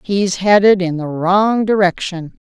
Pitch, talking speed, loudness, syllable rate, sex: 190 Hz, 145 wpm, -15 LUFS, 4.0 syllables/s, female